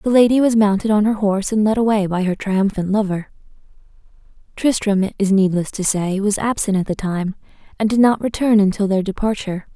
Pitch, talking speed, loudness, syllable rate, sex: 205 Hz, 195 wpm, -18 LUFS, 5.8 syllables/s, female